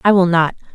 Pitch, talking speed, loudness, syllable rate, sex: 180 Hz, 245 wpm, -15 LUFS, 6.3 syllables/s, female